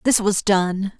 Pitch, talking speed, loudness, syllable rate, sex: 200 Hz, 180 wpm, -19 LUFS, 3.5 syllables/s, female